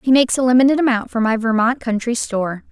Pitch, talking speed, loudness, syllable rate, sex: 240 Hz, 220 wpm, -17 LUFS, 6.6 syllables/s, female